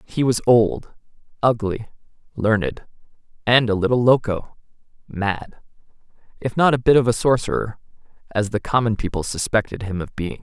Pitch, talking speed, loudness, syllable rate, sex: 115 Hz, 130 wpm, -20 LUFS, 5.1 syllables/s, male